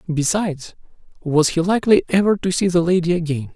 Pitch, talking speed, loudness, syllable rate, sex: 175 Hz, 170 wpm, -18 LUFS, 5.9 syllables/s, male